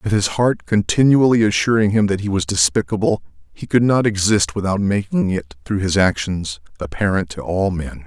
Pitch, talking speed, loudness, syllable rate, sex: 100 Hz, 180 wpm, -18 LUFS, 5.1 syllables/s, male